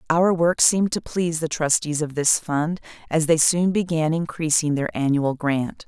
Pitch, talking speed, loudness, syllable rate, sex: 160 Hz, 185 wpm, -21 LUFS, 4.7 syllables/s, female